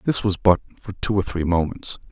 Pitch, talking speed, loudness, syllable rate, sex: 95 Hz, 225 wpm, -22 LUFS, 5.3 syllables/s, male